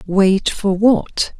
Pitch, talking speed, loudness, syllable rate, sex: 200 Hz, 130 wpm, -16 LUFS, 2.5 syllables/s, female